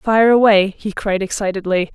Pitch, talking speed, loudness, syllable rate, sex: 200 Hz, 155 wpm, -16 LUFS, 4.9 syllables/s, female